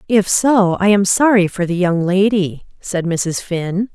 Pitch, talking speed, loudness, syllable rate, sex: 190 Hz, 180 wpm, -15 LUFS, 3.9 syllables/s, female